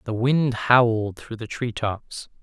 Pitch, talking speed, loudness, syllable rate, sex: 115 Hz, 175 wpm, -22 LUFS, 3.7 syllables/s, male